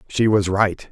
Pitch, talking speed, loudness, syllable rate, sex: 100 Hz, 195 wpm, -19 LUFS, 4.1 syllables/s, male